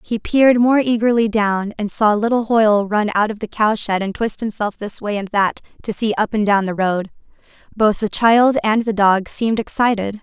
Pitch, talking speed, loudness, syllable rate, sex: 215 Hz, 215 wpm, -17 LUFS, 5.0 syllables/s, female